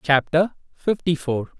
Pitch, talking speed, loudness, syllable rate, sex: 155 Hz, 115 wpm, -22 LUFS, 4.1 syllables/s, male